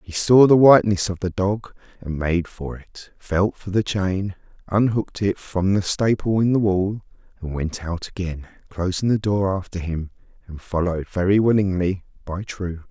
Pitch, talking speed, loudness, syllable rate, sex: 95 Hz, 175 wpm, -21 LUFS, 4.7 syllables/s, male